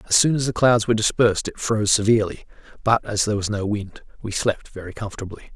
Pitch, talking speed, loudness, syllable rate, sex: 110 Hz, 215 wpm, -21 LUFS, 6.8 syllables/s, male